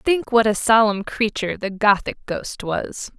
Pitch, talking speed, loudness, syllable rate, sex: 215 Hz, 170 wpm, -20 LUFS, 4.2 syllables/s, female